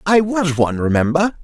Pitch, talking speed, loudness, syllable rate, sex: 160 Hz, 165 wpm, -17 LUFS, 5.4 syllables/s, male